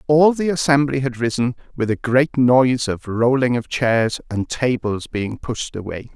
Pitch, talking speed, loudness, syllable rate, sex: 125 Hz, 175 wpm, -19 LUFS, 4.4 syllables/s, male